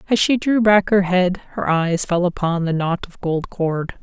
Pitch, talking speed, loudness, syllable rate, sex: 185 Hz, 225 wpm, -19 LUFS, 4.2 syllables/s, female